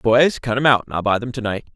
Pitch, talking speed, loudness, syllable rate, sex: 120 Hz, 310 wpm, -19 LUFS, 6.3 syllables/s, male